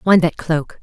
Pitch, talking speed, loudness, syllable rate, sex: 165 Hz, 215 wpm, -17 LUFS, 4.2 syllables/s, female